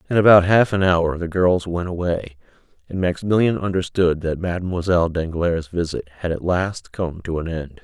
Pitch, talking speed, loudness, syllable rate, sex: 90 Hz, 175 wpm, -20 LUFS, 5.1 syllables/s, male